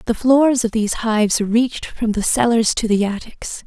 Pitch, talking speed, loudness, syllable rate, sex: 225 Hz, 195 wpm, -17 LUFS, 4.8 syllables/s, female